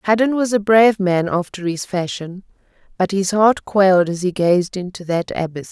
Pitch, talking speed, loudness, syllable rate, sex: 190 Hz, 190 wpm, -17 LUFS, 5.0 syllables/s, female